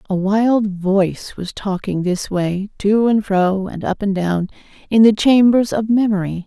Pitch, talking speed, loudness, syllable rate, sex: 200 Hz, 175 wpm, -17 LUFS, 4.2 syllables/s, female